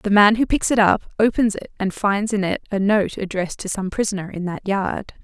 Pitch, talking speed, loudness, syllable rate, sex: 200 Hz, 240 wpm, -20 LUFS, 5.4 syllables/s, female